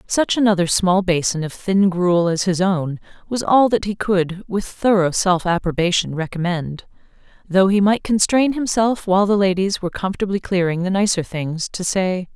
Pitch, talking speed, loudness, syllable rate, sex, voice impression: 190 Hz, 175 wpm, -18 LUFS, 4.9 syllables/s, female, feminine, adult-like, tensed, slightly powerful, clear, fluent, intellectual, calm, elegant, slightly strict